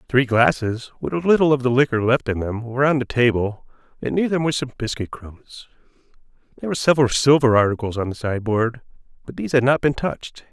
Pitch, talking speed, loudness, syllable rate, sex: 125 Hz, 205 wpm, -20 LUFS, 6.4 syllables/s, male